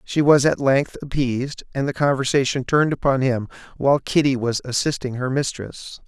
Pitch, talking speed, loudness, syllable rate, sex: 130 Hz, 170 wpm, -20 LUFS, 5.3 syllables/s, male